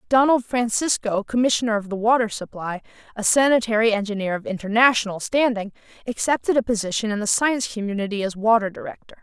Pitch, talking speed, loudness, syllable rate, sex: 220 Hz, 150 wpm, -21 LUFS, 6.2 syllables/s, female